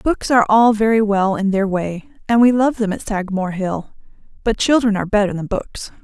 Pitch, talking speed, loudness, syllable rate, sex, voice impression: 210 Hz, 210 wpm, -17 LUFS, 5.6 syllables/s, female, very feminine, slightly young, slightly adult-like, very thin, tensed, slightly powerful, bright, very hard, very clear, fluent, slightly raspy, cute, slightly cool, intellectual, very refreshing, very sincere, slightly calm, friendly, reassuring, very unique, elegant, slightly wild, sweet, lively, slightly kind, strict, slightly intense, slightly sharp